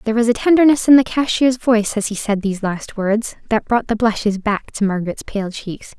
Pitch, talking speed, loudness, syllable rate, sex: 220 Hz, 230 wpm, -17 LUFS, 5.6 syllables/s, female